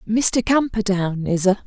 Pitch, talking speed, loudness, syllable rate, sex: 205 Hz, 145 wpm, -19 LUFS, 4.1 syllables/s, female